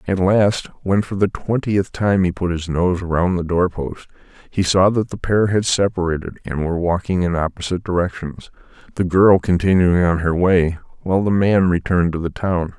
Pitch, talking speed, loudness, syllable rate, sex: 90 Hz, 190 wpm, -18 LUFS, 5.1 syllables/s, male